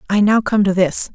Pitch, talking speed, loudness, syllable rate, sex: 200 Hz, 265 wpm, -15 LUFS, 5.2 syllables/s, female